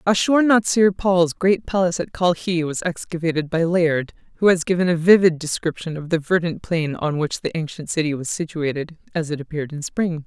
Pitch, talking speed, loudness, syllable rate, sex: 170 Hz, 195 wpm, -20 LUFS, 5.4 syllables/s, female